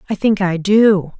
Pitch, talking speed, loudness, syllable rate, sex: 195 Hz, 200 wpm, -14 LUFS, 4.3 syllables/s, female